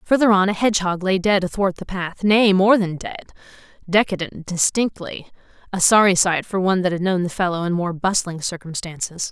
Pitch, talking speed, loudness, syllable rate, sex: 185 Hz, 180 wpm, -19 LUFS, 5.5 syllables/s, female